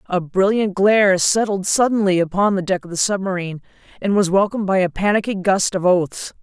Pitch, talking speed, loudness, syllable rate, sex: 190 Hz, 185 wpm, -18 LUFS, 5.6 syllables/s, female